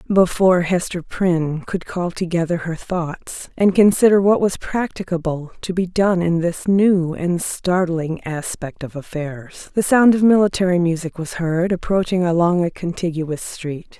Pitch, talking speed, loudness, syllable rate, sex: 175 Hz, 155 wpm, -19 LUFS, 4.3 syllables/s, female